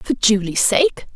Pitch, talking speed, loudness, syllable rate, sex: 220 Hz, 155 wpm, -17 LUFS, 3.8 syllables/s, female